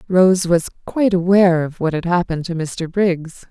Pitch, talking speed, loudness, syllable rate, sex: 175 Hz, 190 wpm, -17 LUFS, 5.1 syllables/s, female